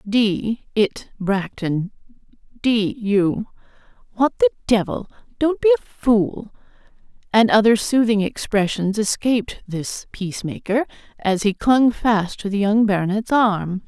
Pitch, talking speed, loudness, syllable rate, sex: 215 Hz, 110 wpm, -20 LUFS, 4.0 syllables/s, female